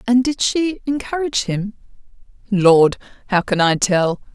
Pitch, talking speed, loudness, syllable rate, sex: 220 Hz, 140 wpm, -17 LUFS, 4.4 syllables/s, female